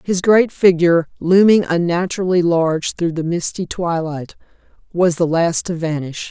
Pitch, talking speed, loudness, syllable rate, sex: 170 Hz, 145 wpm, -16 LUFS, 4.7 syllables/s, female